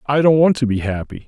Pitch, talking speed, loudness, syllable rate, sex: 130 Hz, 285 wpm, -16 LUFS, 6.1 syllables/s, male